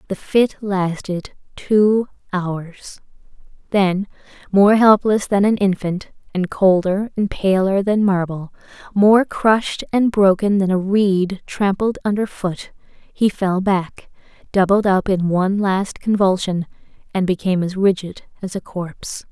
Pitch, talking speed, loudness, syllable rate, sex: 195 Hz, 135 wpm, -18 LUFS, 4.0 syllables/s, female